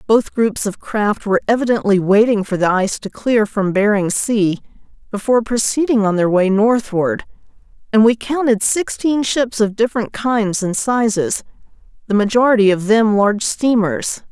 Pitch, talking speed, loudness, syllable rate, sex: 215 Hz, 155 wpm, -16 LUFS, 4.8 syllables/s, female